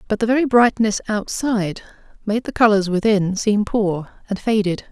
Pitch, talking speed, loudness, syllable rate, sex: 210 Hz, 160 wpm, -19 LUFS, 5.0 syllables/s, female